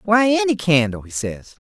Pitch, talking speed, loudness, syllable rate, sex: 140 Hz, 180 wpm, -19 LUFS, 4.7 syllables/s, male